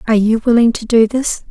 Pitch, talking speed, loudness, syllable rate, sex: 225 Hz, 240 wpm, -13 LUFS, 6.3 syllables/s, female